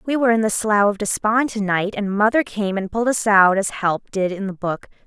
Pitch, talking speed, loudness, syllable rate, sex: 210 Hz, 250 wpm, -19 LUFS, 5.5 syllables/s, female